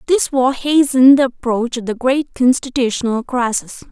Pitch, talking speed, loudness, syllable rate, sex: 255 Hz, 155 wpm, -15 LUFS, 4.9 syllables/s, female